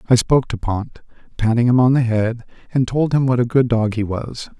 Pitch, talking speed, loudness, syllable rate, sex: 120 Hz, 235 wpm, -18 LUFS, 5.4 syllables/s, male